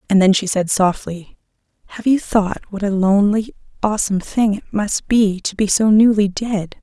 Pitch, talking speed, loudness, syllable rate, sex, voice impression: 205 Hz, 185 wpm, -17 LUFS, 5.0 syllables/s, female, feminine, adult-like, slightly middle-aged, thin, tensed, slightly weak, slightly bright, hard, clear, fluent, cute, intellectual, slightly refreshing, sincere, calm, friendly, slightly reassuring, unique, slightly elegant, slightly sweet, lively, intense, sharp, slightly modest